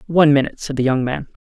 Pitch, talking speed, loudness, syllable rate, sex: 140 Hz, 255 wpm, -17 LUFS, 7.8 syllables/s, male